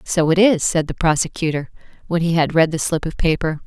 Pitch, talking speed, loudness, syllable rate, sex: 165 Hz, 230 wpm, -18 LUFS, 5.7 syllables/s, female